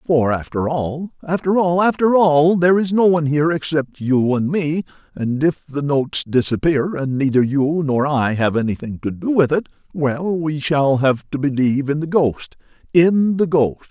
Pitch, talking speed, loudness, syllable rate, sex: 150 Hz, 190 wpm, -18 LUFS, 4.7 syllables/s, male